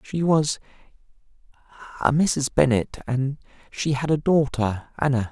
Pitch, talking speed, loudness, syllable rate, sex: 140 Hz, 125 wpm, -23 LUFS, 4.2 syllables/s, male